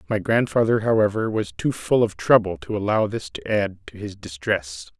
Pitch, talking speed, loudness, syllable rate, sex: 110 Hz, 190 wpm, -22 LUFS, 4.9 syllables/s, male